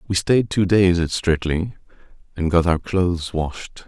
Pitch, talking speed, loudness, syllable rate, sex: 90 Hz, 170 wpm, -20 LUFS, 4.2 syllables/s, male